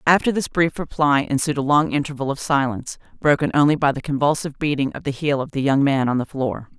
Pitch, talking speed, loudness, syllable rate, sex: 145 Hz, 230 wpm, -20 LUFS, 6.1 syllables/s, female